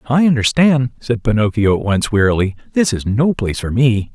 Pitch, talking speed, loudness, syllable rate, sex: 120 Hz, 190 wpm, -16 LUFS, 5.3 syllables/s, male